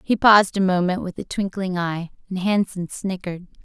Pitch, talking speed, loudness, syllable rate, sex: 185 Hz, 180 wpm, -21 LUFS, 5.3 syllables/s, female